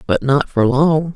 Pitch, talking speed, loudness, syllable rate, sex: 140 Hz, 210 wpm, -15 LUFS, 4.0 syllables/s, female